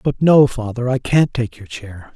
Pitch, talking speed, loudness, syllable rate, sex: 125 Hz, 220 wpm, -16 LUFS, 4.4 syllables/s, male